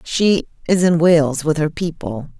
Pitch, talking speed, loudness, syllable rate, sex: 160 Hz, 175 wpm, -17 LUFS, 4.0 syllables/s, female